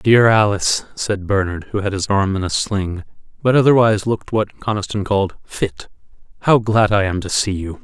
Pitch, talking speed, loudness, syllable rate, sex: 100 Hz, 190 wpm, -18 LUFS, 5.4 syllables/s, male